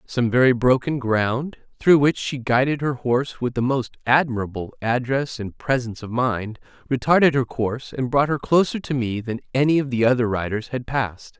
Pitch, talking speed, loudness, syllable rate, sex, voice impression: 125 Hz, 190 wpm, -21 LUFS, 5.2 syllables/s, male, masculine, very adult-like, slightly thick, cool, sincere, slightly calm, slightly kind